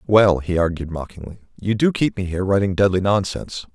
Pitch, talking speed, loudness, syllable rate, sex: 95 Hz, 190 wpm, -20 LUFS, 6.0 syllables/s, male